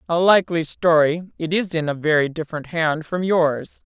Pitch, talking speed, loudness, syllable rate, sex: 165 Hz, 185 wpm, -20 LUFS, 5.0 syllables/s, female